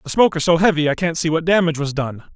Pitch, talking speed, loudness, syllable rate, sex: 165 Hz, 305 wpm, -18 LUFS, 7.2 syllables/s, male